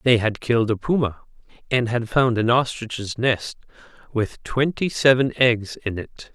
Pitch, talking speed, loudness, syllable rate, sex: 120 Hz, 160 wpm, -21 LUFS, 4.3 syllables/s, male